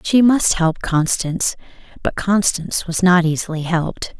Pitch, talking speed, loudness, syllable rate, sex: 175 Hz, 145 wpm, -18 LUFS, 4.7 syllables/s, female